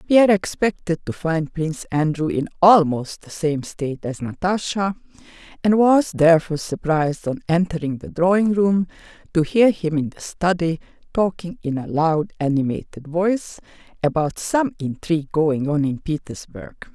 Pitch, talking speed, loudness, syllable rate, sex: 165 Hz, 145 wpm, -20 LUFS, 4.8 syllables/s, female